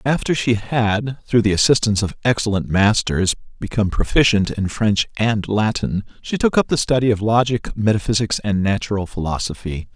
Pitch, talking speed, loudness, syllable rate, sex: 110 Hz, 155 wpm, -19 LUFS, 5.2 syllables/s, male